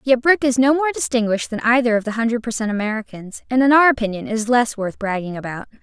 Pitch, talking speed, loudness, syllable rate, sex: 235 Hz, 225 wpm, -18 LUFS, 6.4 syllables/s, female